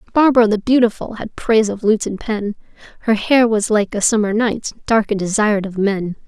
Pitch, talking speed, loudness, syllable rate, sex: 215 Hz, 200 wpm, -17 LUFS, 5.5 syllables/s, female